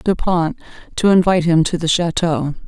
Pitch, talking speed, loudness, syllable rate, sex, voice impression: 170 Hz, 180 wpm, -16 LUFS, 5.1 syllables/s, female, feminine, adult-like, slightly sincere, calm, friendly, slightly sweet